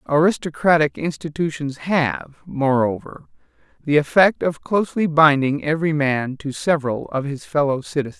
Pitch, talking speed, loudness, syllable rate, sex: 150 Hz, 125 wpm, -19 LUFS, 5.0 syllables/s, male